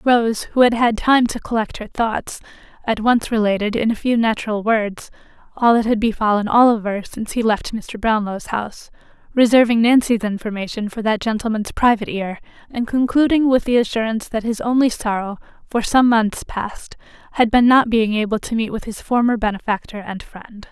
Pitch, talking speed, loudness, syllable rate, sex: 225 Hz, 180 wpm, -18 LUFS, 5.3 syllables/s, female